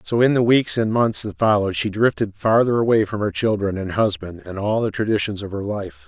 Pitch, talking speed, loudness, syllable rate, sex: 105 Hz, 235 wpm, -20 LUFS, 5.6 syllables/s, male